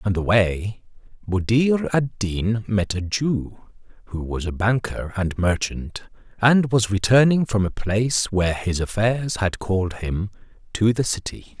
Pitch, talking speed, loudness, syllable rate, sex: 105 Hz, 155 wpm, -22 LUFS, 4.1 syllables/s, male